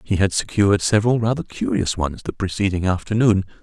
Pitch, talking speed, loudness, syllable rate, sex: 100 Hz, 165 wpm, -20 LUFS, 6.0 syllables/s, male